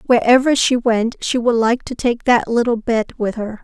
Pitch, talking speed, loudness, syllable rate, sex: 235 Hz, 215 wpm, -17 LUFS, 4.8 syllables/s, female